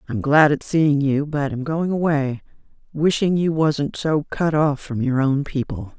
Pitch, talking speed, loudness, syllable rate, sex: 145 Hz, 190 wpm, -20 LUFS, 4.2 syllables/s, female